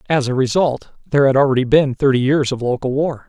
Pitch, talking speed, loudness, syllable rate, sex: 135 Hz, 220 wpm, -16 LUFS, 6.0 syllables/s, male